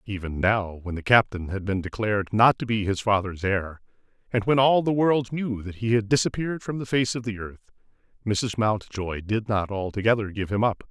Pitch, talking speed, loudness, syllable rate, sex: 105 Hz, 210 wpm, -24 LUFS, 5.3 syllables/s, male